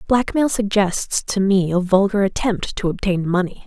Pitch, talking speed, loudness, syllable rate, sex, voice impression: 195 Hz, 165 wpm, -19 LUFS, 4.6 syllables/s, female, feminine, adult-like, tensed, clear, fluent, intellectual, friendly, reassuring, elegant, slightly lively, kind, slightly modest